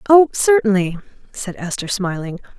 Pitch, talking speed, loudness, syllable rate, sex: 215 Hz, 115 wpm, -17 LUFS, 4.8 syllables/s, female